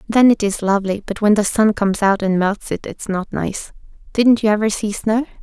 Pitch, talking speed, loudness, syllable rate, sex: 210 Hz, 230 wpm, -17 LUFS, 5.3 syllables/s, female